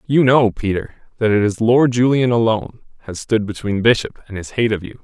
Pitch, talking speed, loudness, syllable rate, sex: 110 Hz, 215 wpm, -17 LUFS, 5.4 syllables/s, male